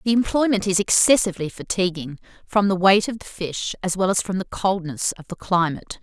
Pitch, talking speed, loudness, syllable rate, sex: 190 Hz, 200 wpm, -21 LUFS, 5.6 syllables/s, female